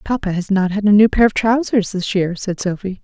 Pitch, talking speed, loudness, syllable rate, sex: 200 Hz, 255 wpm, -16 LUFS, 5.5 syllables/s, female